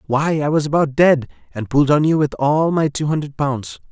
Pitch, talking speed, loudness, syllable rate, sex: 145 Hz, 230 wpm, -17 LUFS, 5.3 syllables/s, male